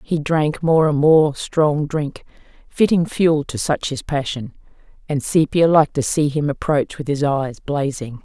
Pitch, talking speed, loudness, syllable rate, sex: 150 Hz, 175 wpm, -18 LUFS, 4.2 syllables/s, female